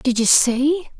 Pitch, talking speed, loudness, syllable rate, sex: 270 Hz, 180 wpm, -16 LUFS, 3.4 syllables/s, female